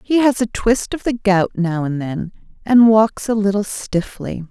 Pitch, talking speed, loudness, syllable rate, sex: 205 Hz, 200 wpm, -17 LUFS, 4.2 syllables/s, female